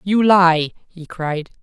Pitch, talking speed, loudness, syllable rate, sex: 175 Hz, 145 wpm, -16 LUFS, 3.0 syllables/s, female